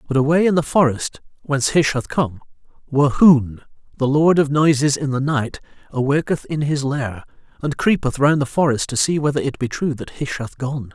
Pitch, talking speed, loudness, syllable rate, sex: 140 Hz, 195 wpm, -19 LUFS, 5.1 syllables/s, male